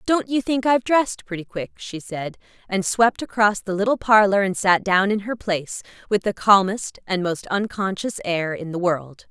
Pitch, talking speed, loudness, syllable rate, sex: 200 Hz, 200 wpm, -21 LUFS, 4.9 syllables/s, female